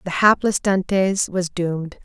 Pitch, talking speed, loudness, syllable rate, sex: 185 Hz, 145 wpm, -19 LUFS, 4.3 syllables/s, female